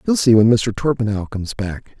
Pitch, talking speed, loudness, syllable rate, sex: 115 Hz, 210 wpm, -17 LUFS, 5.7 syllables/s, male